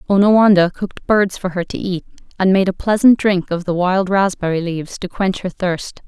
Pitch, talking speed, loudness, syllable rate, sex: 185 Hz, 205 wpm, -16 LUFS, 5.3 syllables/s, female